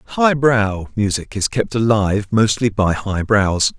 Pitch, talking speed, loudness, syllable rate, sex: 105 Hz, 125 wpm, -17 LUFS, 3.8 syllables/s, male